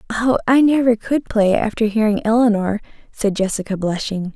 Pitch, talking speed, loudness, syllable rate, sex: 220 Hz, 150 wpm, -18 LUFS, 5.1 syllables/s, female